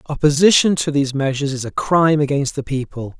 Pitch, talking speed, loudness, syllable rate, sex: 145 Hz, 190 wpm, -17 LUFS, 6.2 syllables/s, male